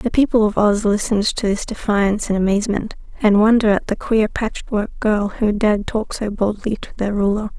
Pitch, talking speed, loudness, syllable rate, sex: 210 Hz, 200 wpm, -18 LUFS, 5.4 syllables/s, female